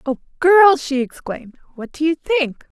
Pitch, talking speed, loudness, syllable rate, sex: 300 Hz, 170 wpm, -17 LUFS, 4.6 syllables/s, female